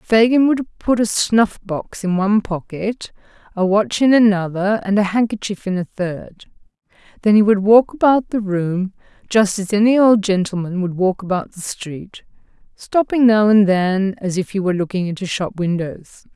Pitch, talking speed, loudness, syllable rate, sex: 200 Hz, 175 wpm, -17 LUFS, 4.7 syllables/s, female